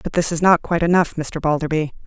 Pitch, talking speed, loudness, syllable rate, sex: 165 Hz, 230 wpm, -19 LUFS, 6.5 syllables/s, female